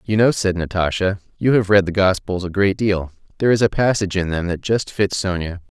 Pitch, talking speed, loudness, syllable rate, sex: 95 Hz, 215 wpm, -19 LUFS, 5.7 syllables/s, male